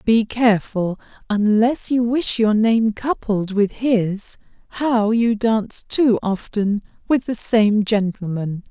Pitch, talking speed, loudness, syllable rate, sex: 220 Hz, 130 wpm, -19 LUFS, 3.6 syllables/s, female